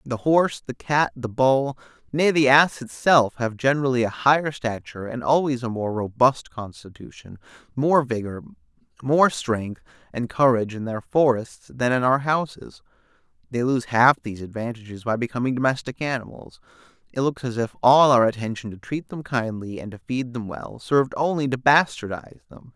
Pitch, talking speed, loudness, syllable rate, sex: 125 Hz, 170 wpm, -22 LUFS, 5.1 syllables/s, male